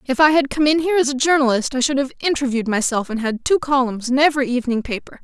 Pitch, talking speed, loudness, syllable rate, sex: 265 Hz, 250 wpm, -18 LUFS, 6.9 syllables/s, female